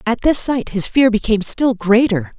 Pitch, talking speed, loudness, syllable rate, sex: 225 Hz, 200 wpm, -16 LUFS, 4.9 syllables/s, female